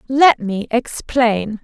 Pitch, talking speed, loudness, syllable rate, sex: 235 Hz, 110 wpm, -16 LUFS, 2.8 syllables/s, female